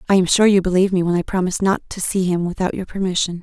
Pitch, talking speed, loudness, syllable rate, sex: 185 Hz, 280 wpm, -18 LUFS, 7.1 syllables/s, female